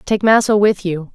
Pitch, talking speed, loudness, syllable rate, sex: 200 Hz, 210 wpm, -15 LUFS, 4.8 syllables/s, female